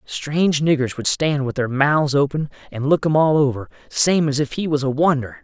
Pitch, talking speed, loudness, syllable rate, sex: 140 Hz, 220 wpm, -19 LUFS, 5.1 syllables/s, male